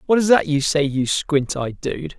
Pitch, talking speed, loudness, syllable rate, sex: 155 Hz, 245 wpm, -19 LUFS, 4.5 syllables/s, male